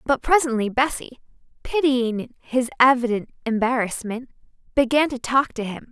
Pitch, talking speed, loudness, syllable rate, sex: 250 Hz, 120 wpm, -21 LUFS, 4.8 syllables/s, female